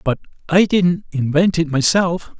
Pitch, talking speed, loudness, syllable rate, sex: 165 Hz, 150 wpm, -17 LUFS, 4.2 syllables/s, male